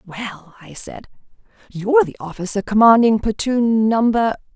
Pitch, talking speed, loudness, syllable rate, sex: 220 Hz, 120 wpm, -17 LUFS, 4.6 syllables/s, female